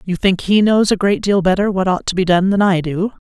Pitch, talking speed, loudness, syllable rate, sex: 190 Hz, 295 wpm, -15 LUFS, 5.6 syllables/s, female